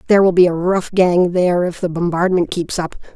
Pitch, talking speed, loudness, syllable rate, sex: 175 Hz, 230 wpm, -16 LUFS, 5.7 syllables/s, female